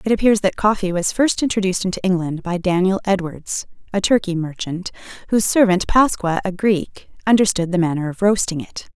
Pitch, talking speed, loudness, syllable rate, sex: 190 Hz, 175 wpm, -19 LUFS, 5.6 syllables/s, female